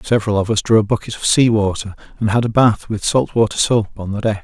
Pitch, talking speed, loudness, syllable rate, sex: 110 Hz, 270 wpm, -16 LUFS, 6.1 syllables/s, male